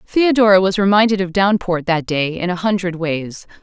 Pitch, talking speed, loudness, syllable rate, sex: 185 Hz, 180 wpm, -16 LUFS, 5.1 syllables/s, female